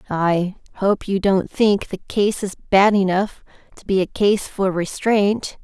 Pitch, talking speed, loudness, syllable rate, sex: 195 Hz, 170 wpm, -19 LUFS, 3.8 syllables/s, female